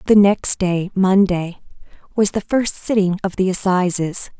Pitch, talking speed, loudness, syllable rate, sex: 190 Hz, 150 wpm, -17 LUFS, 4.3 syllables/s, female